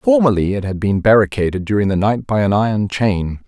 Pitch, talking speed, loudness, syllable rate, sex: 105 Hz, 205 wpm, -16 LUFS, 5.6 syllables/s, male